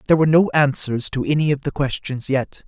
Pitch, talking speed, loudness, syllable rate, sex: 140 Hz, 225 wpm, -19 LUFS, 6.1 syllables/s, male